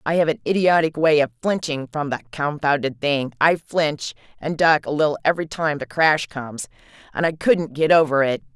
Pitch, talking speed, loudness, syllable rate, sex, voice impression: 150 Hz, 190 wpm, -20 LUFS, 5.3 syllables/s, female, very feminine, slightly gender-neutral, very adult-like, middle-aged, very thin, very tensed, very powerful, very bright, very hard, very clear, fluent, nasal, slightly cool, intellectual, very refreshing, sincere, calm, reassuring, very unique, slightly elegant, very wild, very lively, very strict, intense, very sharp